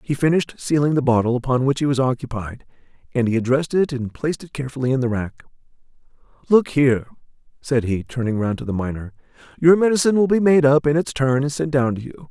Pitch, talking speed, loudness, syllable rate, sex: 135 Hz, 215 wpm, -20 LUFS, 6.5 syllables/s, male